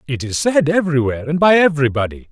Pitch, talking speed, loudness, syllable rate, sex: 150 Hz, 180 wpm, -16 LUFS, 7.0 syllables/s, male